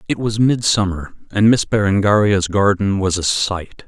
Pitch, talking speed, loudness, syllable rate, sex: 100 Hz, 155 wpm, -16 LUFS, 4.6 syllables/s, male